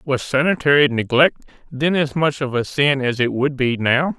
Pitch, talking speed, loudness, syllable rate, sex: 140 Hz, 200 wpm, -18 LUFS, 4.7 syllables/s, male